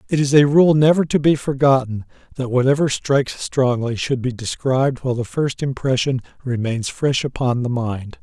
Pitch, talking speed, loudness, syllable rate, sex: 130 Hz, 175 wpm, -19 LUFS, 5.1 syllables/s, male